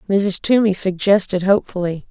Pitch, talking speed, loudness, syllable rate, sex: 190 Hz, 115 wpm, -17 LUFS, 5.4 syllables/s, female